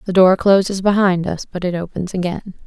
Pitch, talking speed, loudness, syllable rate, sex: 185 Hz, 205 wpm, -17 LUFS, 5.5 syllables/s, female